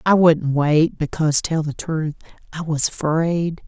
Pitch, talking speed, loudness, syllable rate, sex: 160 Hz, 165 wpm, -19 LUFS, 4.1 syllables/s, female